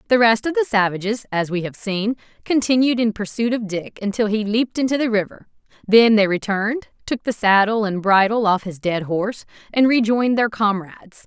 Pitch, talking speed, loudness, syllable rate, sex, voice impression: 215 Hz, 190 wpm, -19 LUFS, 5.5 syllables/s, female, feminine, adult-like, slightly tensed, fluent, slightly refreshing, friendly